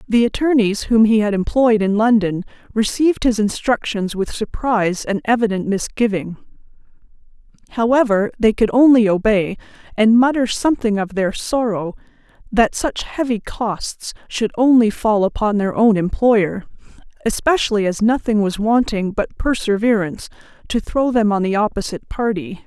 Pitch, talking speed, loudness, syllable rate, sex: 220 Hz, 135 wpm, -17 LUFS, 4.9 syllables/s, female